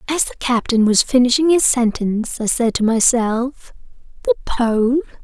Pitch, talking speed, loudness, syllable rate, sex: 245 Hz, 150 wpm, -17 LUFS, 4.6 syllables/s, female